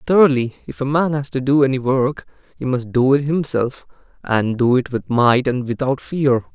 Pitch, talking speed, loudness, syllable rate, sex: 135 Hz, 200 wpm, -18 LUFS, 4.7 syllables/s, male